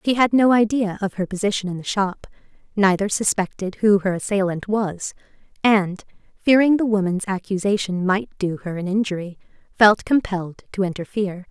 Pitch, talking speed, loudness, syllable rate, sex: 200 Hz, 155 wpm, -20 LUFS, 5.2 syllables/s, female